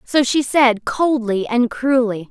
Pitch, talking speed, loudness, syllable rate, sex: 245 Hz, 155 wpm, -17 LUFS, 3.7 syllables/s, female